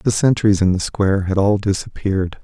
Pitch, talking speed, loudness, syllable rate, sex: 100 Hz, 195 wpm, -18 LUFS, 5.4 syllables/s, male